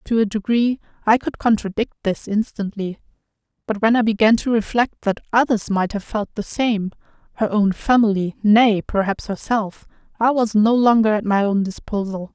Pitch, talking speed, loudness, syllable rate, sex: 215 Hz, 160 wpm, -19 LUFS, 4.9 syllables/s, female